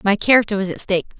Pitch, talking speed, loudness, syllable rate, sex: 200 Hz, 250 wpm, -17 LUFS, 8.1 syllables/s, female